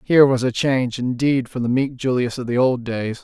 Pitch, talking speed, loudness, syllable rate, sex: 125 Hz, 240 wpm, -20 LUFS, 5.4 syllables/s, male